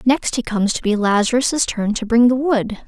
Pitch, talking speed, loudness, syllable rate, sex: 235 Hz, 230 wpm, -17 LUFS, 5.1 syllables/s, female